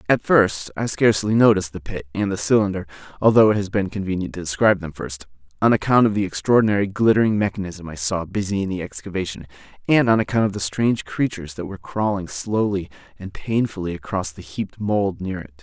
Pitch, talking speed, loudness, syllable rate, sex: 95 Hz, 195 wpm, -21 LUFS, 6.2 syllables/s, male